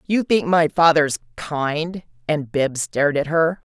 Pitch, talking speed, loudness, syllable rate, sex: 155 Hz, 160 wpm, -20 LUFS, 3.8 syllables/s, female